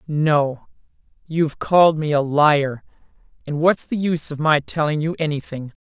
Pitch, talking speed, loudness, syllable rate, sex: 150 Hz, 155 wpm, -19 LUFS, 4.8 syllables/s, female